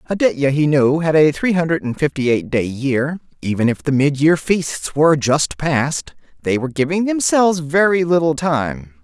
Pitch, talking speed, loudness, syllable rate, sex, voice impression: 150 Hz, 180 wpm, -17 LUFS, 4.8 syllables/s, male, very masculine, slightly middle-aged, very thick, very tensed, powerful, bright, slightly soft, muffled, fluent, cool, very intellectual, refreshing, sincere, calm, slightly mature, very friendly, very reassuring, very unique, slightly elegant, wild, sweet, lively, kind, slightly intense, slightly light